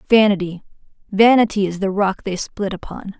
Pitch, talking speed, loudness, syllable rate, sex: 200 Hz, 130 wpm, -18 LUFS, 5.1 syllables/s, female